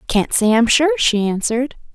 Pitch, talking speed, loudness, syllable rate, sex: 235 Hz, 185 wpm, -16 LUFS, 5.0 syllables/s, female